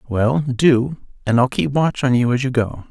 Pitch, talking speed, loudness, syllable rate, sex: 130 Hz, 230 wpm, -18 LUFS, 4.5 syllables/s, male